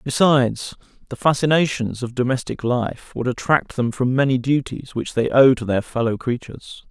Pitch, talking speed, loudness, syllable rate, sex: 130 Hz, 165 wpm, -20 LUFS, 5.0 syllables/s, male